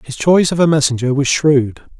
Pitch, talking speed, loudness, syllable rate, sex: 145 Hz, 210 wpm, -14 LUFS, 5.7 syllables/s, male